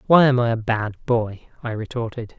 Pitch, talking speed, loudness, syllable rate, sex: 120 Hz, 200 wpm, -22 LUFS, 5.2 syllables/s, male